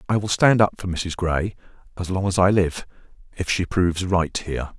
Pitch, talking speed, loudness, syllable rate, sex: 90 Hz, 215 wpm, -22 LUFS, 5.3 syllables/s, male